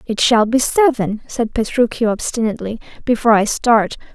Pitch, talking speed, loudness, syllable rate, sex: 230 Hz, 145 wpm, -16 LUFS, 5.4 syllables/s, female